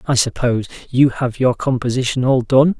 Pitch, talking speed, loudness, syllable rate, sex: 125 Hz, 170 wpm, -17 LUFS, 5.4 syllables/s, male